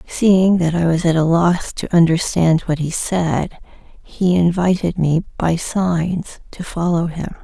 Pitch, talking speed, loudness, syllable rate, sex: 170 Hz, 160 wpm, -17 LUFS, 3.8 syllables/s, female